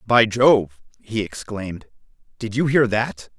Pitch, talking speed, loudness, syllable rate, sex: 110 Hz, 140 wpm, -20 LUFS, 3.9 syllables/s, male